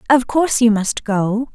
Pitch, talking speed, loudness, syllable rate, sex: 235 Hz, 195 wpm, -16 LUFS, 4.4 syllables/s, female